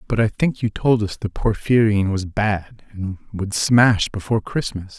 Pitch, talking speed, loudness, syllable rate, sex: 105 Hz, 180 wpm, -20 LUFS, 4.4 syllables/s, male